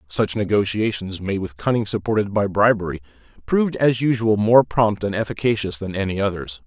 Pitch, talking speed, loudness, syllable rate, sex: 105 Hz, 160 wpm, -20 LUFS, 5.5 syllables/s, male